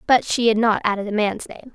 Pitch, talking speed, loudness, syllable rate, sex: 220 Hz, 275 wpm, -19 LUFS, 5.7 syllables/s, female